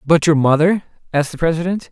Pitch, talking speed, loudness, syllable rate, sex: 160 Hz, 190 wpm, -16 LUFS, 6.6 syllables/s, male